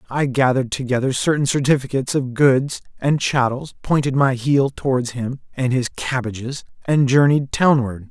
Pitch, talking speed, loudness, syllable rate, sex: 130 Hz, 150 wpm, -19 LUFS, 4.9 syllables/s, male